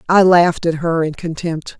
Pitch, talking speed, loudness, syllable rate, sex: 170 Hz, 200 wpm, -16 LUFS, 5.0 syllables/s, female